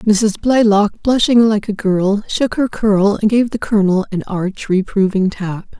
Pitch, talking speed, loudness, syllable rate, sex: 205 Hz, 175 wpm, -15 LUFS, 4.2 syllables/s, female